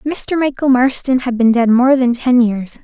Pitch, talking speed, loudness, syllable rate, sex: 250 Hz, 210 wpm, -14 LUFS, 4.3 syllables/s, female